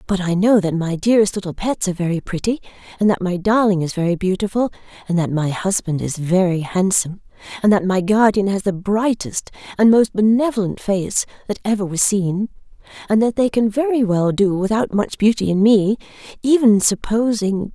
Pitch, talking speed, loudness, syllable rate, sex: 200 Hz, 180 wpm, -18 LUFS, 5.4 syllables/s, female